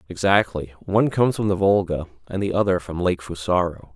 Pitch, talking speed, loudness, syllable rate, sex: 90 Hz, 180 wpm, -22 LUFS, 5.8 syllables/s, male